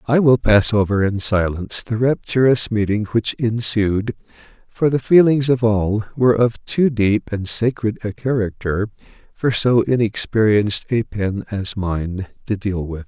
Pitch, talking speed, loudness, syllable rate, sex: 110 Hz, 155 wpm, -18 LUFS, 4.3 syllables/s, male